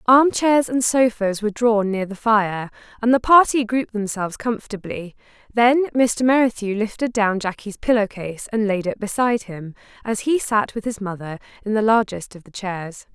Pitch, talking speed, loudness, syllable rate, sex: 215 Hz, 180 wpm, -20 LUFS, 5.0 syllables/s, female